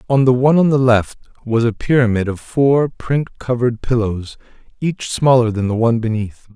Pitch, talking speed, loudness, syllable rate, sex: 120 Hz, 185 wpm, -16 LUFS, 5.2 syllables/s, male